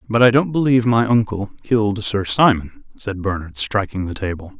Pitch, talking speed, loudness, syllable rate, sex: 105 Hz, 185 wpm, -18 LUFS, 5.3 syllables/s, male